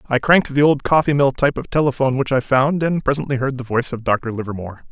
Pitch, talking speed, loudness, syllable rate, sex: 135 Hz, 245 wpm, -18 LUFS, 6.8 syllables/s, male